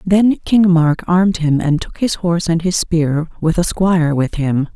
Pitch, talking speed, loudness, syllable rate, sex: 170 Hz, 215 wpm, -15 LUFS, 4.4 syllables/s, female